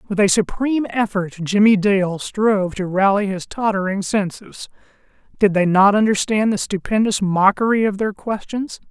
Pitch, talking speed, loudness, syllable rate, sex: 200 Hz, 150 wpm, -18 LUFS, 4.8 syllables/s, male